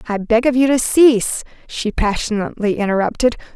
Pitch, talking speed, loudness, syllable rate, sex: 230 Hz, 150 wpm, -16 LUFS, 5.8 syllables/s, female